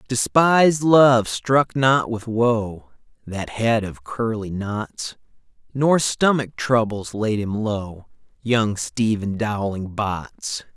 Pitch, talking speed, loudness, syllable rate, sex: 115 Hz, 115 wpm, -20 LUFS, 3.0 syllables/s, male